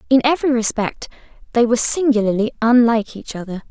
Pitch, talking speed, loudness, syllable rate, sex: 235 Hz, 145 wpm, -17 LUFS, 6.6 syllables/s, female